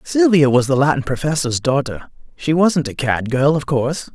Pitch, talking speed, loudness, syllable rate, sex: 145 Hz, 190 wpm, -17 LUFS, 5.1 syllables/s, male